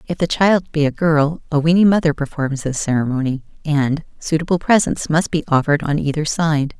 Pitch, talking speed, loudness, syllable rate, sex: 155 Hz, 185 wpm, -18 LUFS, 5.3 syllables/s, female